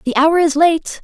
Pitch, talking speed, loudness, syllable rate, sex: 315 Hz, 230 wpm, -14 LUFS, 4.4 syllables/s, female